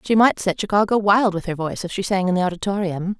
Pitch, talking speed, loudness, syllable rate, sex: 195 Hz, 265 wpm, -20 LUFS, 6.5 syllables/s, female